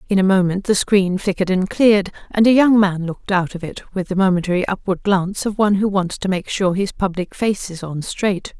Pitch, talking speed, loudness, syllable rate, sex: 190 Hz, 235 wpm, -18 LUFS, 5.7 syllables/s, female